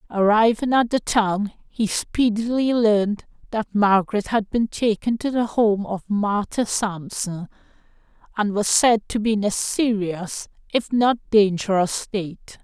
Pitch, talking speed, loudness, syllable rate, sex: 210 Hz, 145 wpm, -21 LUFS, 4.1 syllables/s, female